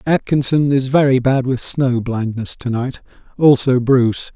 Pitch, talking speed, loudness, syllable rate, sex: 130 Hz, 150 wpm, -16 LUFS, 4.4 syllables/s, male